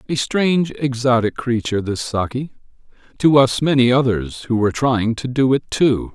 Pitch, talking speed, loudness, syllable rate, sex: 125 Hz, 165 wpm, -18 LUFS, 5.0 syllables/s, male